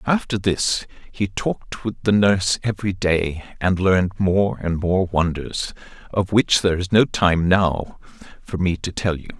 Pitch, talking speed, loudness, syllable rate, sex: 95 Hz, 170 wpm, -20 LUFS, 4.4 syllables/s, male